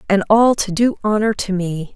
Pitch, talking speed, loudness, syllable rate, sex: 205 Hz, 215 wpm, -17 LUFS, 4.9 syllables/s, female